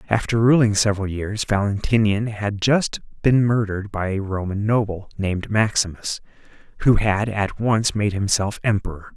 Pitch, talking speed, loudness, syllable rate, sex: 105 Hz, 145 wpm, -21 LUFS, 4.9 syllables/s, male